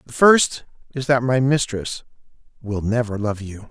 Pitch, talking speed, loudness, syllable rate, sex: 120 Hz, 160 wpm, -20 LUFS, 4.4 syllables/s, male